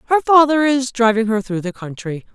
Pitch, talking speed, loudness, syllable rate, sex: 240 Hz, 205 wpm, -16 LUFS, 5.3 syllables/s, female